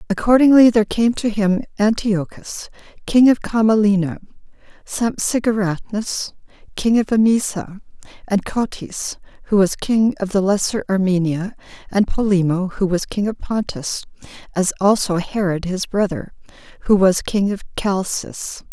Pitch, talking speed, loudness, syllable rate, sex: 200 Hz, 125 wpm, -18 LUFS, 4.6 syllables/s, female